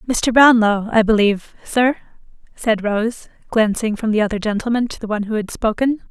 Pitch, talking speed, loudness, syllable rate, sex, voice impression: 220 Hz, 175 wpm, -17 LUFS, 5.4 syllables/s, female, feminine, adult-like, tensed, bright, slightly soft, clear, slightly raspy, slightly refreshing, friendly, reassuring, lively, kind